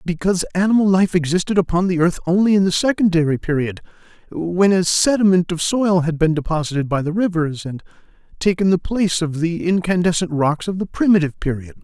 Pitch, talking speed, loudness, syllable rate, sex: 175 Hz, 175 wpm, -18 LUFS, 5.9 syllables/s, male